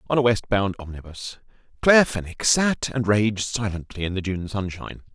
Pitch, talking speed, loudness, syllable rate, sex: 105 Hz, 175 wpm, -22 LUFS, 5.2 syllables/s, male